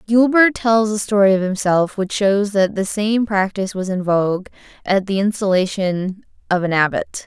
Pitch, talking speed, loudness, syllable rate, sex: 200 Hz, 175 wpm, -18 LUFS, 4.8 syllables/s, female